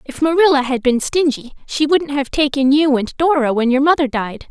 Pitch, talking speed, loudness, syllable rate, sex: 280 Hz, 215 wpm, -16 LUFS, 5.2 syllables/s, female